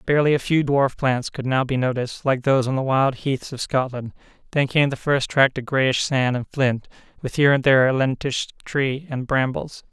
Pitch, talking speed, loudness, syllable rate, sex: 135 Hz, 220 wpm, -21 LUFS, 5.3 syllables/s, male